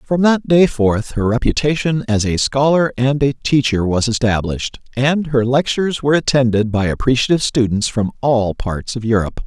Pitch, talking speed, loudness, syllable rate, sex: 125 Hz, 170 wpm, -16 LUFS, 5.2 syllables/s, male